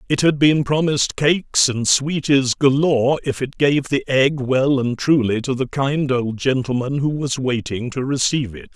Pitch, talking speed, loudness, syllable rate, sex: 135 Hz, 185 wpm, -18 LUFS, 4.6 syllables/s, male